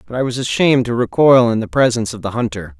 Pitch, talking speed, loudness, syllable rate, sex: 120 Hz, 260 wpm, -15 LUFS, 6.8 syllables/s, male